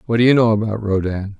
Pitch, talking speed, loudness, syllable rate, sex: 105 Hz, 260 wpm, -17 LUFS, 6.5 syllables/s, male